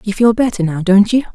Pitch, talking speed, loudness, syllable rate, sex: 210 Hz, 270 wpm, -13 LUFS, 6.0 syllables/s, female